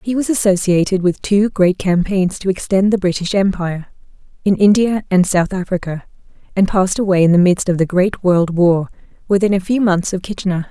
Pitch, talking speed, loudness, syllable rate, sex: 190 Hz, 180 wpm, -15 LUFS, 5.5 syllables/s, female